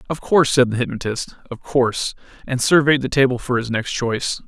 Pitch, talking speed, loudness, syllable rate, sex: 130 Hz, 200 wpm, -19 LUFS, 5.8 syllables/s, male